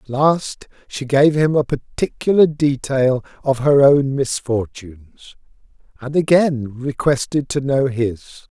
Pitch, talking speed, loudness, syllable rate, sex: 135 Hz, 125 wpm, -17 LUFS, 3.8 syllables/s, male